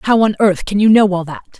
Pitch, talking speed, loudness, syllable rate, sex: 200 Hz, 300 wpm, -13 LUFS, 5.6 syllables/s, female